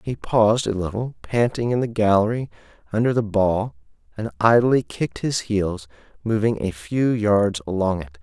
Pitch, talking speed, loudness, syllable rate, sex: 105 Hz, 160 wpm, -21 LUFS, 4.8 syllables/s, male